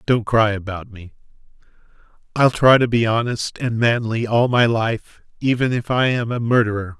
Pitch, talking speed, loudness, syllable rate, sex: 115 Hz, 170 wpm, -18 LUFS, 4.7 syllables/s, male